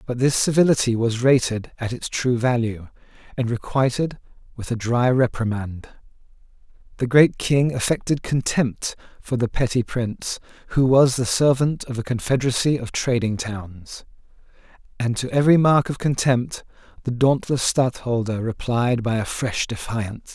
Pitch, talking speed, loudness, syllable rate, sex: 125 Hz, 140 wpm, -21 LUFS, 4.7 syllables/s, male